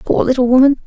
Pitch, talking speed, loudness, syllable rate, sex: 255 Hz, 210 wpm, -12 LUFS, 6.9 syllables/s, female